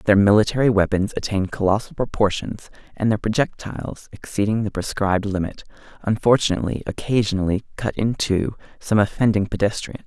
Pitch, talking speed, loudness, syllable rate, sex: 105 Hz, 125 wpm, -21 LUFS, 5.9 syllables/s, male